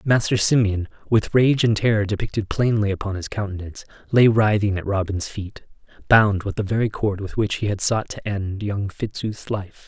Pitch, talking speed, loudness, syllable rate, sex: 105 Hz, 190 wpm, -21 LUFS, 5.1 syllables/s, male